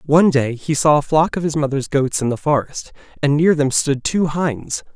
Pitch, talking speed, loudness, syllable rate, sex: 145 Hz, 230 wpm, -18 LUFS, 5.0 syllables/s, male